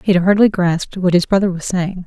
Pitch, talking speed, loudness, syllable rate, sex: 185 Hz, 260 wpm, -16 LUFS, 6.1 syllables/s, female